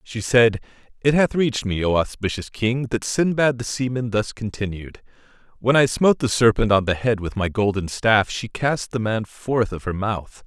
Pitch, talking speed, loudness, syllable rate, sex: 115 Hz, 195 wpm, -21 LUFS, 4.8 syllables/s, male